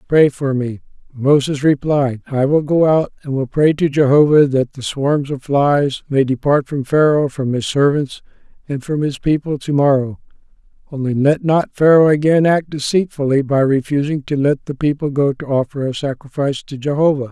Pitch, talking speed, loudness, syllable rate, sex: 140 Hz, 180 wpm, -16 LUFS, 4.9 syllables/s, male